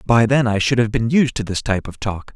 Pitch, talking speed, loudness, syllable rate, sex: 115 Hz, 305 wpm, -18 LUFS, 5.9 syllables/s, male